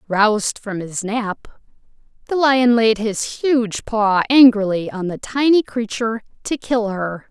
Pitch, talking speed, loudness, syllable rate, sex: 225 Hz, 150 wpm, -18 LUFS, 4.0 syllables/s, female